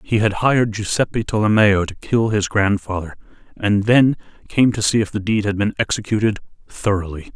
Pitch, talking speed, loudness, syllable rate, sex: 105 Hz, 170 wpm, -18 LUFS, 5.3 syllables/s, male